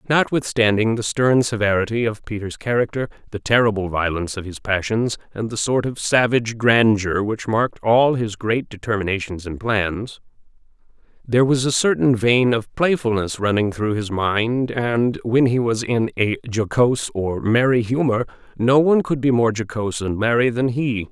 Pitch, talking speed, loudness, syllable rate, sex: 115 Hz, 165 wpm, -19 LUFS, 4.9 syllables/s, male